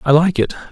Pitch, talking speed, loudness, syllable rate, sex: 155 Hz, 250 wpm, -16 LUFS, 6.4 syllables/s, male